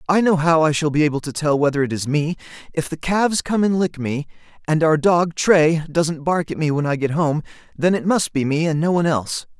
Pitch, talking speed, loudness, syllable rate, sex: 160 Hz, 255 wpm, -19 LUFS, 5.6 syllables/s, male